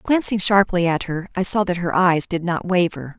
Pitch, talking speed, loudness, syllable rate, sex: 180 Hz, 225 wpm, -19 LUFS, 5.0 syllables/s, female